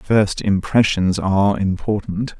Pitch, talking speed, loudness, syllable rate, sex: 100 Hz, 100 wpm, -18 LUFS, 3.8 syllables/s, male